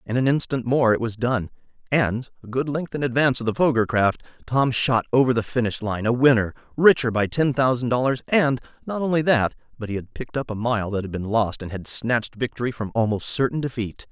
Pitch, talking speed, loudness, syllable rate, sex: 120 Hz, 225 wpm, -22 LUFS, 5.7 syllables/s, male